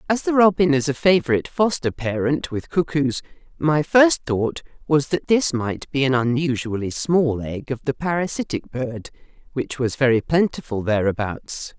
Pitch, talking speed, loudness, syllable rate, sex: 140 Hz, 160 wpm, -21 LUFS, 4.7 syllables/s, female